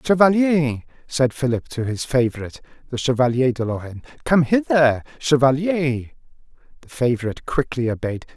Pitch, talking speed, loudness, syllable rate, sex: 135 Hz, 120 wpm, -20 LUFS, 5.3 syllables/s, male